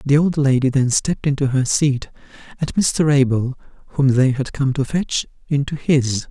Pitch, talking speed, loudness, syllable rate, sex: 140 Hz, 180 wpm, -18 LUFS, 4.1 syllables/s, male